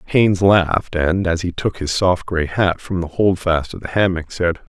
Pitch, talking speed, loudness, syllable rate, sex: 90 Hz, 215 wpm, -18 LUFS, 4.6 syllables/s, male